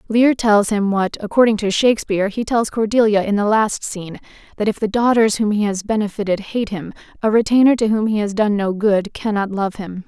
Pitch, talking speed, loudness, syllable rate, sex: 210 Hz, 220 wpm, -17 LUFS, 5.6 syllables/s, female